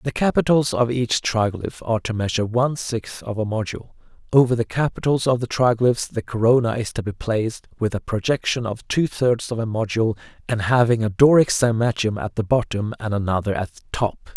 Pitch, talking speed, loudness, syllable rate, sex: 115 Hz, 195 wpm, -21 LUFS, 5.6 syllables/s, male